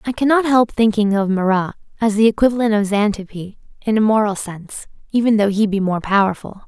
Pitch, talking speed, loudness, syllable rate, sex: 210 Hz, 190 wpm, -17 LUFS, 4.9 syllables/s, female